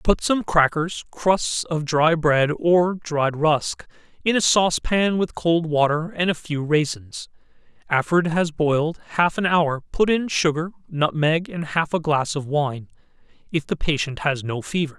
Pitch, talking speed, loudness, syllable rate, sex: 160 Hz, 175 wpm, -21 LUFS, 4.1 syllables/s, male